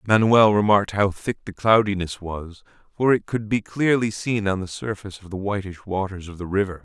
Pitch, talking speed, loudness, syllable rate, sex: 100 Hz, 200 wpm, -22 LUFS, 5.4 syllables/s, male